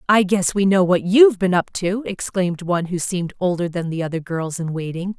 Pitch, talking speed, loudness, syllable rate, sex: 185 Hz, 230 wpm, -19 LUFS, 5.7 syllables/s, female